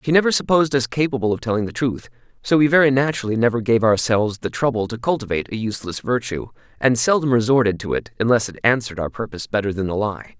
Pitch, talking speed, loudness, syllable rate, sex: 120 Hz, 215 wpm, -20 LUFS, 6.9 syllables/s, male